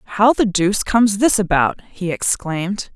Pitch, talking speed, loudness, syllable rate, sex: 200 Hz, 160 wpm, -17 LUFS, 4.5 syllables/s, female